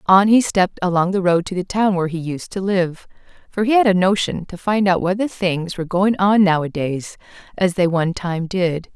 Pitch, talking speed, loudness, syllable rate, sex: 185 Hz, 220 wpm, -18 LUFS, 5.3 syllables/s, female